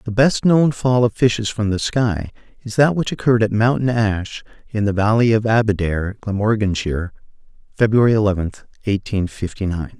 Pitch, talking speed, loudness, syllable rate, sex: 110 Hz, 160 wpm, -18 LUFS, 5.3 syllables/s, male